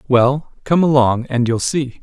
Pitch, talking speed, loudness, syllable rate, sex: 130 Hz, 180 wpm, -16 LUFS, 4.0 syllables/s, male